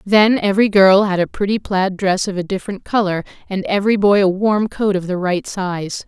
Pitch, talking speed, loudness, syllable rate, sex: 195 Hz, 215 wpm, -17 LUFS, 5.3 syllables/s, female